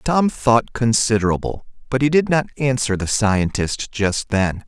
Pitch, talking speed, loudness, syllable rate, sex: 115 Hz, 155 wpm, -19 LUFS, 4.2 syllables/s, male